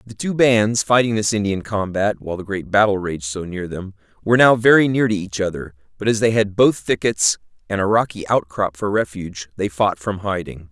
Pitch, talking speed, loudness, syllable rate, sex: 100 Hz, 215 wpm, -19 LUFS, 5.4 syllables/s, male